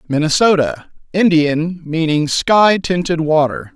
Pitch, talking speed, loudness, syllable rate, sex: 165 Hz, 80 wpm, -15 LUFS, 3.9 syllables/s, male